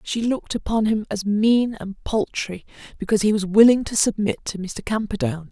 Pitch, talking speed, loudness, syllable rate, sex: 205 Hz, 185 wpm, -21 LUFS, 5.3 syllables/s, female